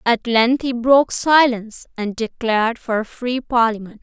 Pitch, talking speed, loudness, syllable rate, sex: 235 Hz, 165 wpm, -18 LUFS, 4.7 syllables/s, female